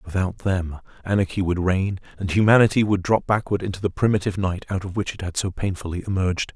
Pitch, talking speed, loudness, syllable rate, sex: 95 Hz, 200 wpm, -22 LUFS, 6.2 syllables/s, male